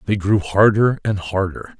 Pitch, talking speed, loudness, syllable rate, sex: 100 Hz, 165 wpm, -18 LUFS, 4.4 syllables/s, male